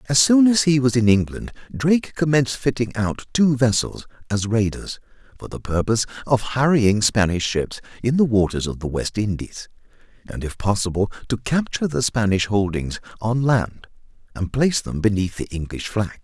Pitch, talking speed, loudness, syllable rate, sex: 115 Hz, 170 wpm, -20 LUFS, 5.1 syllables/s, male